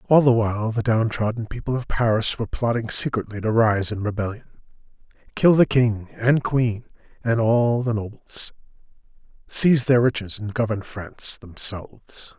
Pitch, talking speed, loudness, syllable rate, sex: 115 Hz, 150 wpm, -22 LUFS, 5.0 syllables/s, male